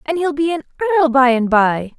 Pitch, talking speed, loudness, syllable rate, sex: 285 Hz, 240 wpm, -16 LUFS, 5.3 syllables/s, female